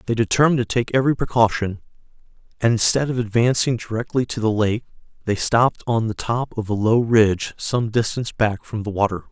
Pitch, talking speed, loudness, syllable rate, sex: 115 Hz, 185 wpm, -20 LUFS, 5.9 syllables/s, male